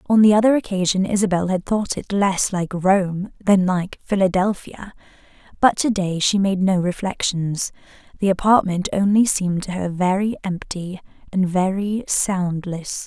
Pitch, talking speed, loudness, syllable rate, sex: 190 Hz, 145 wpm, -20 LUFS, 4.5 syllables/s, female